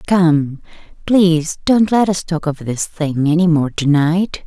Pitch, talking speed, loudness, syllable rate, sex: 165 Hz, 175 wpm, -15 LUFS, 4.0 syllables/s, female